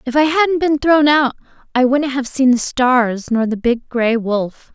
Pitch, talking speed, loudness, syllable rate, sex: 260 Hz, 215 wpm, -16 LUFS, 4.0 syllables/s, female